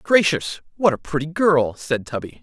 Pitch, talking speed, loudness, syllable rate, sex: 155 Hz, 175 wpm, -21 LUFS, 4.7 syllables/s, male